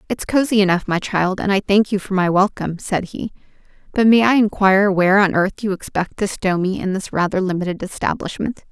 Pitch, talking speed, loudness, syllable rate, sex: 195 Hz, 215 wpm, -18 LUFS, 5.7 syllables/s, female